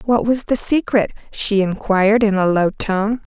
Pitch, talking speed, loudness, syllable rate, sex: 210 Hz, 180 wpm, -17 LUFS, 4.4 syllables/s, female